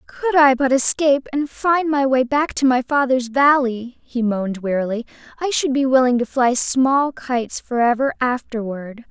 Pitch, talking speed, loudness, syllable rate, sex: 260 Hz, 170 wpm, -18 LUFS, 4.6 syllables/s, female